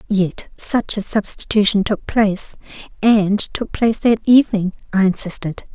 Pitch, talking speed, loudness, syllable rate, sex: 205 Hz, 135 wpm, -17 LUFS, 4.8 syllables/s, female